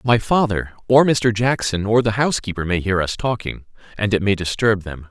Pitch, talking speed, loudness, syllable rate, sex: 105 Hz, 200 wpm, -19 LUFS, 5.2 syllables/s, male